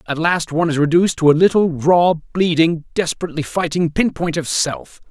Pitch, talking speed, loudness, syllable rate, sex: 165 Hz, 190 wpm, -17 LUFS, 5.4 syllables/s, male